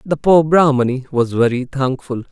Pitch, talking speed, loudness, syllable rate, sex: 135 Hz, 155 wpm, -15 LUFS, 4.7 syllables/s, male